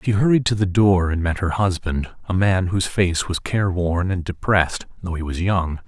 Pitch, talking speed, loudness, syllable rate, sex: 90 Hz, 215 wpm, -20 LUFS, 5.1 syllables/s, male